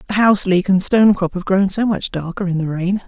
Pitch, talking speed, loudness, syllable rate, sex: 190 Hz, 275 wpm, -16 LUFS, 6.0 syllables/s, female